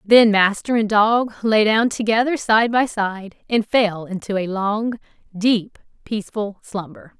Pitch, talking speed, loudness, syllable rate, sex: 210 Hz, 150 wpm, -19 LUFS, 4.0 syllables/s, female